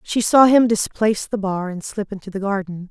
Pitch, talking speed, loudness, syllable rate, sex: 205 Hz, 225 wpm, -19 LUFS, 5.3 syllables/s, female